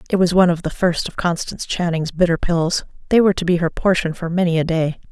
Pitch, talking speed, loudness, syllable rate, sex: 170 Hz, 245 wpm, -19 LUFS, 6.3 syllables/s, female